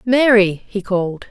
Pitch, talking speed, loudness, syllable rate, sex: 205 Hz, 140 wpm, -16 LUFS, 4.2 syllables/s, female